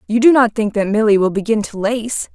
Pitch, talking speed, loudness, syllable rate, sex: 220 Hz, 255 wpm, -15 LUFS, 5.6 syllables/s, female